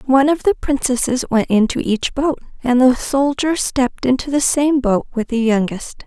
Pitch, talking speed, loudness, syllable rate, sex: 260 Hz, 190 wpm, -17 LUFS, 4.9 syllables/s, female